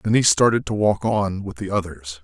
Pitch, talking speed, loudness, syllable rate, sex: 100 Hz, 240 wpm, -20 LUFS, 5.2 syllables/s, male